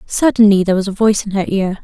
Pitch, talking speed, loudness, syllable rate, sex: 205 Hz, 260 wpm, -14 LUFS, 7.1 syllables/s, female